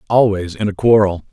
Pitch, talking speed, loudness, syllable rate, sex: 105 Hz, 180 wpm, -15 LUFS, 5.6 syllables/s, male